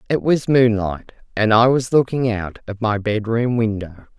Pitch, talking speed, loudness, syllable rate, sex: 115 Hz, 170 wpm, -18 LUFS, 4.5 syllables/s, female